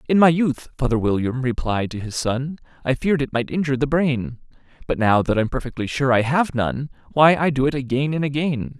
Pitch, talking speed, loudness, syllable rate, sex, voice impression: 135 Hz, 220 wpm, -21 LUFS, 5.6 syllables/s, male, masculine, adult-like, tensed, hard, fluent, cool, intellectual, calm, slightly mature, elegant, wild, lively, strict